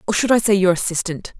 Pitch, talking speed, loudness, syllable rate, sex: 195 Hz, 260 wpm, -18 LUFS, 6.6 syllables/s, female